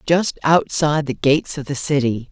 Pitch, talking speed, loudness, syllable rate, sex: 145 Hz, 180 wpm, -18 LUFS, 5.1 syllables/s, female